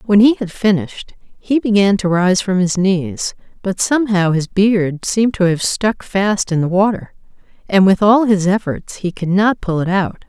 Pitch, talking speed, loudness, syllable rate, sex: 195 Hz, 200 wpm, -15 LUFS, 4.6 syllables/s, female